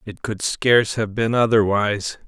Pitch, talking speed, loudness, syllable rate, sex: 110 Hz, 160 wpm, -19 LUFS, 4.8 syllables/s, male